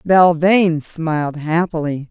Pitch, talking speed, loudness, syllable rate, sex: 165 Hz, 85 wpm, -16 LUFS, 4.2 syllables/s, female